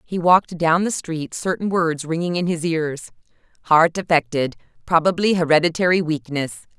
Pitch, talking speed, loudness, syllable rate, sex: 165 Hz, 125 wpm, -20 LUFS, 5.0 syllables/s, female